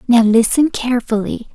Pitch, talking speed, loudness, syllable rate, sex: 240 Hz, 115 wpm, -15 LUFS, 5.1 syllables/s, female